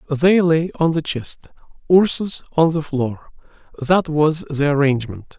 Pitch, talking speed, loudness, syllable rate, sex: 155 Hz, 145 wpm, -18 LUFS, 4.3 syllables/s, male